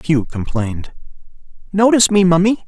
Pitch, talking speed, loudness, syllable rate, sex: 175 Hz, 110 wpm, -15 LUFS, 5.4 syllables/s, male